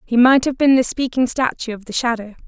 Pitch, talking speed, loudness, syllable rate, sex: 245 Hz, 245 wpm, -17 LUFS, 5.8 syllables/s, female